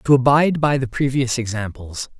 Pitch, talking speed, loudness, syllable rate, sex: 125 Hz, 165 wpm, -19 LUFS, 5.5 syllables/s, male